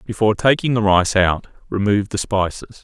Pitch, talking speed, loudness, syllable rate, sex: 105 Hz, 170 wpm, -18 LUFS, 5.5 syllables/s, male